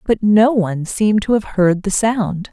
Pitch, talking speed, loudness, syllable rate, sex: 200 Hz, 215 wpm, -16 LUFS, 4.6 syllables/s, female